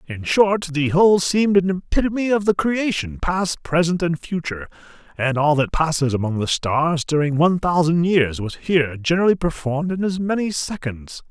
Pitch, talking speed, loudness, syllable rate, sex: 165 Hz, 175 wpm, -20 LUFS, 5.2 syllables/s, male